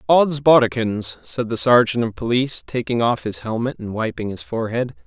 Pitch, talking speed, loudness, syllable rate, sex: 120 Hz, 165 wpm, -20 LUFS, 5.3 syllables/s, male